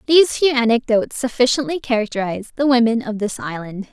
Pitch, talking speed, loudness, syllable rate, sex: 240 Hz, 155 wpm, -18 LUFS, 6.5 syllables/s, female